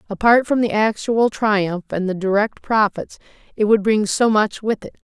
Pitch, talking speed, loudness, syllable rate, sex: 210 Hz, 190 wpm, -18 LUFS, 4.7 syllables/s, female